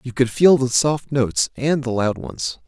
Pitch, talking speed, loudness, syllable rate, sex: 125 Hz, 225 wpm, -19 LUFS, 4.5 syllables/s, male